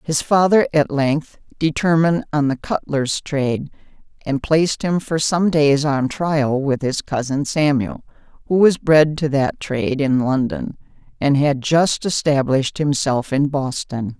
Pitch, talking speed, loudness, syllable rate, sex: 145 Hz, 150 wpm, -18 LUFS, 4.2 syllables/s, female